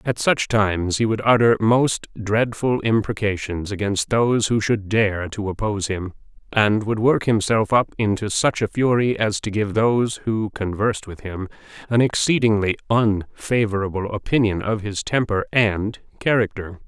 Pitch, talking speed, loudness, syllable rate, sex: 105 Hz, 155 wpm, -20 LUFS, 4.6 syllables/s, male